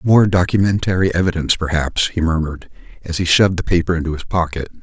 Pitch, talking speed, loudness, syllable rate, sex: 85 Hz, 175 wpm, -17 LUFS, 6.6 syllables/s, male